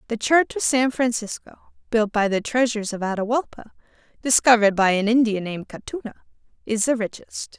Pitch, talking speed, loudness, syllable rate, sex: 230 Hz, 160 wpm, -21 LUFS, 5.7 syllables/s, female